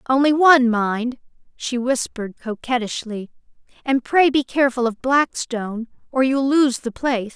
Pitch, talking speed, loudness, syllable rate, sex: 250 Hz, 140 wpm, -19 LUFS, 4.8 syllables/s, female